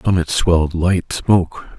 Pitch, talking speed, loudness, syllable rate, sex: 85 Hz, 170 wpm, -17 LUFS, 4.3 syllables/s, male